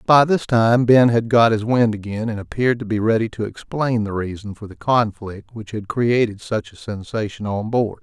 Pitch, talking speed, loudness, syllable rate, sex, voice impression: 110 Hz, 215 wpm, -19 LUFS, 5.0 syllables/s, male, masculine, middle-aged, slightly weak, clear, slightly halting, intellectual, sincere, mature, slightly wild, slightly strict